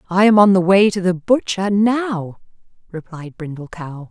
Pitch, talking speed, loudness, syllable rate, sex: 185 Hz, 175 wpm, -15 LUFS, 4.4 syllables/s, female